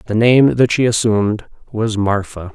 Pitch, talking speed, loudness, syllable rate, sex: 110 Hz, 165 wpm, -15 LUFS, 4.6 syllables/s, male